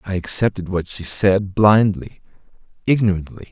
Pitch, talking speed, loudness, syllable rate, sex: 95 Hz, 120 wpm, -18 LUFS, 4.7 syllables/s, male